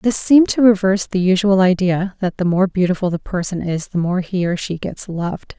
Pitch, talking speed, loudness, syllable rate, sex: 185 Hz, 225 wpm, -17 LUFS, 5.5 syllables/s, female